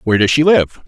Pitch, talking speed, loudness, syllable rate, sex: 130 Hz, 275 wpm, -13 LUFS, 6.7 syllables/s, male